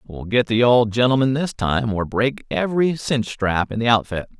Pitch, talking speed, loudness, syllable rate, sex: 115 Hz, 205 wpm, -19 LUFS, 4.8 syllables/s, male